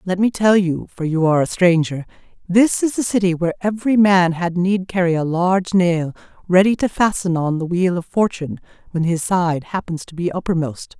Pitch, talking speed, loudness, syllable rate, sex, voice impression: 180 Hz, 190 wpm, -18 LUFS, 5.4 syllables/s, female, feminine, very adult-like, slightly refreshing, sincere, calm